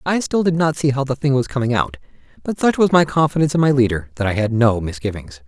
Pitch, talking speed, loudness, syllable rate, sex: 135 Hz, 265 wpm, -18 LUFS, 6.4 syllables/s, male